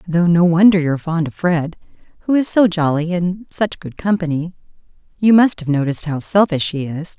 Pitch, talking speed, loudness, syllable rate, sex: 175 Hz, 200 wpm, -16 LUFS, 5.4 syllables/s, female